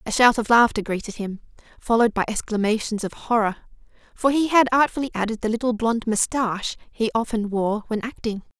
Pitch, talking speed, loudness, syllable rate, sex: 225 Hz, 175 wpm, -22 LUFS, 5.8 syllables/s, female